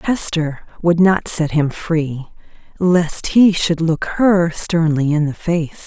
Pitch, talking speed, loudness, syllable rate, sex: 165 Hz, 155 wpm, -16 LUFS, 3.3 syllables/s, female